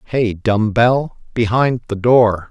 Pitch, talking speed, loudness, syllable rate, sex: 115 Hz, 95 wpm, -16 LUFS, 3.3 syllables/s, male